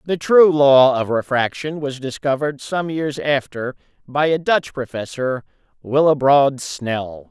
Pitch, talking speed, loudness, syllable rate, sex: 140 Hz, 130 wpm, -18 LUFS, 4.1 syllables/s, male